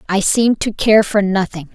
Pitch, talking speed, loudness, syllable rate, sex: 200 Hz, 205 wpm, -15 LUFS, 5.2 syllables/s, female